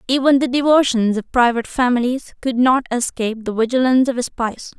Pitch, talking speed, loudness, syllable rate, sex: 245 Hz, 175 wpm, -17 LUFS, 5.9 syllables/s, female